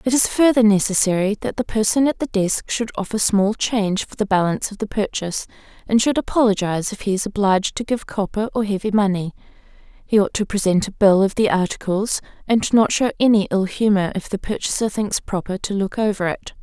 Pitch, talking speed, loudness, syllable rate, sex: 205 Hz, 205 wpm, -19 LUFS, 5.8 syllables/s, female